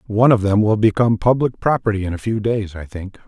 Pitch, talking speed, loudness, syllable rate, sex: 105 Hz, 240 wpm, -17 LUFS, 6.3 syllables/s, male